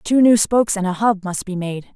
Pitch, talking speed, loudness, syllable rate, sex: 200 Hz, 275 wpm, -18 LUFS, 5.4 syllables/s, female